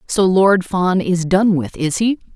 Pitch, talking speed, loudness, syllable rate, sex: 185 Hz, 205 wpm, -16 LUFS, 3.8 syllables/s, female